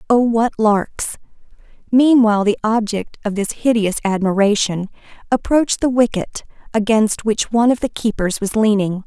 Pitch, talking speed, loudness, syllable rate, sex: 220 Hz, 140 wpm, -17 LUFS, 4.8 syllables/s, female